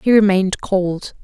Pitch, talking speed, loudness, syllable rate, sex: 195 Hz, 145 wpm, -17 LUFS, 4.6 syllables/s, female